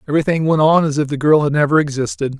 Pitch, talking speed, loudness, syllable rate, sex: 150 Hz, 250 wpm, -15 LUFS, 7.3 syllables/s, male